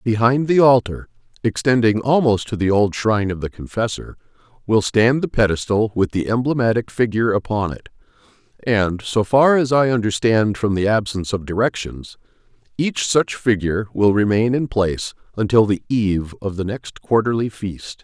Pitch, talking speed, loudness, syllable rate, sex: 110 Hz, 145 wpm, -18 LUFS, 5.1 syllables/s, male